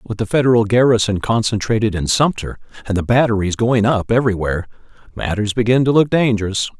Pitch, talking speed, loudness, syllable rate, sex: 110 Hz, 160 wpm, -16 LUFS, 6.1 syllables/s, male